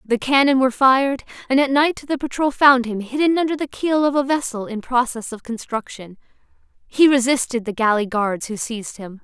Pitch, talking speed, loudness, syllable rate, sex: 250 Hz, 195 wpm, -19 LUFS, 5.4 syllables/s, female